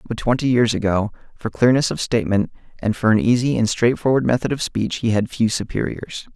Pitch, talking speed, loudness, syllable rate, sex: 115 Hz, 200 wpm, -19 LUFS, 5.7 syllables/s, male